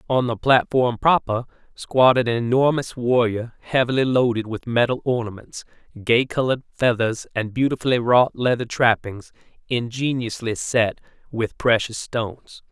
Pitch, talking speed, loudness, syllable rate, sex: 120 Hz, 125 wpm, -21 LUFS, 4.7 syllables/s, male